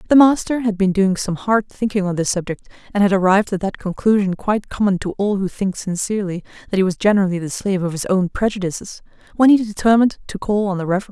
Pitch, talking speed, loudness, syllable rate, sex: 200 Hz, 225 wpm, -18 LUFS, 6.4 syllables/s, female